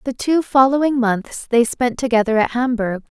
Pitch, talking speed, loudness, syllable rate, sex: 245 Hz, 170 wpm, -17 LUFS, 4.7 syllables/s, female